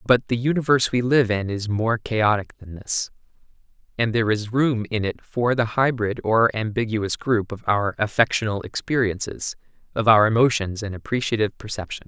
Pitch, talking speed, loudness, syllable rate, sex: 110 Hz, 165 wpm, -22 LUFS, 5.1 syllables/s, male